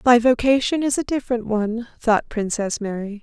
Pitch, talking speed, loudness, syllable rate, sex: 230 Hz, 170 wpm, -21 LUFS, 5.4 syllables/s, female